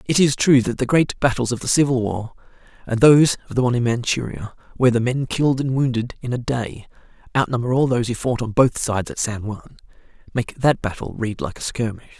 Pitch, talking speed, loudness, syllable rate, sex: 125 Hz, 220 wpm, -20 LUFS, 6.1 syllables/s, male